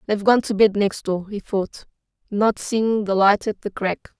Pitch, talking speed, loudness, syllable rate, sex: 205 Hz, 215 wpm, -21 LUFS, 4.5 syllables/s, female